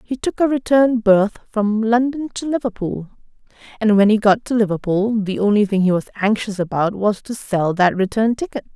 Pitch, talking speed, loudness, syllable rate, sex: 215 Hz, 190 wpm, -18 LUFS, 5.2 syllables/s, female